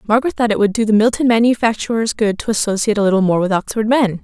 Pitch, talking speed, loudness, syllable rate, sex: 220 Hz, 240 wpm, -16 LUFS, 7.1 syllables/s, female